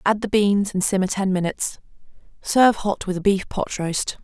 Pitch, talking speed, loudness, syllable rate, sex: 195 Hz, 200 wpm, -21 LUFS, 5.2 syllables/s, female